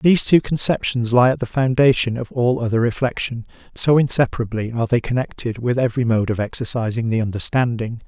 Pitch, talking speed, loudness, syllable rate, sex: 120 Hz, 170 wpm, -19 LUFS, 6.0 syllables/s, male